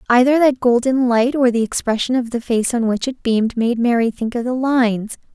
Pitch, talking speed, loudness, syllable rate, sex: 240 Hz, 225 wpm, -17 LUFS, 5.4 syllables/s, female